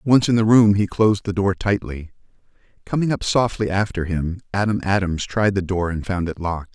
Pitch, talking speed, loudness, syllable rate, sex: 100 Hz, 205 wpm, -20 LUFS, 5.4 syllables/s, male